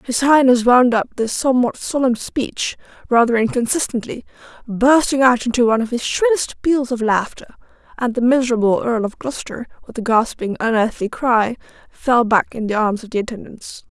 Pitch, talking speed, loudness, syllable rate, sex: 240 Hz, 170 wpm, -17 LUFS, 5.3 syllables/s, female